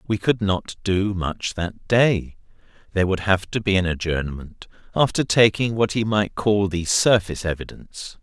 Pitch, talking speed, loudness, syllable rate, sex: 100 Hz, 170 wpm, -21 LUFS, 4.6 syllables/s, male